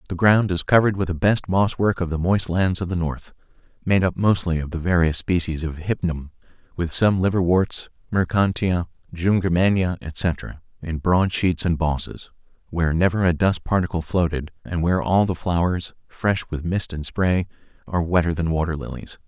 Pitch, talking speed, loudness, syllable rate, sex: 90 Hz, 175 wpm, -22 LUFS, 5.0 syllables/s, male